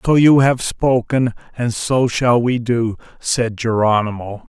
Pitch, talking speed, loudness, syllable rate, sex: 120 Hz, 145 wpm, -17 LUFS, 3.8 syllables/s, male